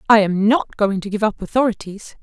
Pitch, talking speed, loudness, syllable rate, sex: 210 Hz, 215 wpm, -18 LUFS, 5.5 syllables/s, female